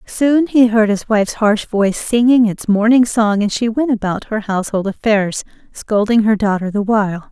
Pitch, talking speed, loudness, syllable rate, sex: 215 Hz, 190 wpm, -15 LUFS, 4.9 syllables/s, female